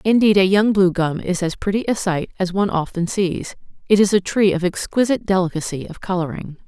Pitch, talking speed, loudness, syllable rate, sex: 185 Hz, 205 wpm, -19 LUFS, 5.8 syllables/s, female